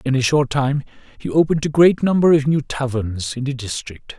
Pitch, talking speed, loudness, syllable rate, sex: 135 Hz, 215 wpm, -18 LUFS, 5.4 syllables/s, male